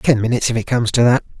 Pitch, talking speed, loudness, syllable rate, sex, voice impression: 115 Hz, 300 wpm, -16 LUFS, 8.1 syllables/s, male, masculine, adult-like, fluent, refreshing, sincere, slightly kind